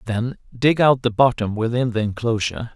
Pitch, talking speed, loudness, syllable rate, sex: 115 Hz, 175 wpm, -20 LUFS, 5.3 syllables/s, male